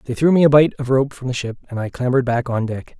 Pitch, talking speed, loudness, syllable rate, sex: 130 Hz, 320 wpm, -18 LUFS, 6.7 syllables/s, male